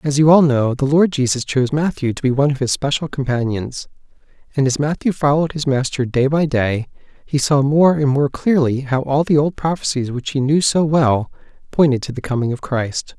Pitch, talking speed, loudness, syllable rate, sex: 140 Hz, 215 wpm, -17 LUFS, 5.4 syllables/s, male